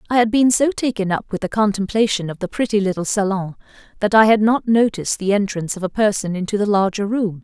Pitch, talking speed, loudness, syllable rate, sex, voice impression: 205 Hz, 225 wpm, -18 LUFS, 6.2 syllables/s, female, very feminine, slightly young, thin, slightly tensed, slightly powerful, bright, hard, clear, fluent, cute, intellectual, refreshing, very sincere, calm, very friendly, very reassuring, unique, elegant, slightly wild, very sweet, lively, kind, slightly intense, slightly sharp, slightly modest, light